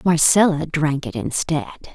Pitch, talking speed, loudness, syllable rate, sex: 155 Hz, 125 wpm, -19 LUFS, 4.5 syllables/s, female